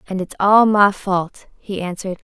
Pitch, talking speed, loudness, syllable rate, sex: 195 Hz, 180 wpm, -17 LUFS, 4.6 syllables/s, female